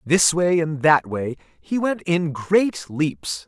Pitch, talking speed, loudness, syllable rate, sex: 160 Hz, 175 wpm, -21 LUFS, 3.1 syllables/s, male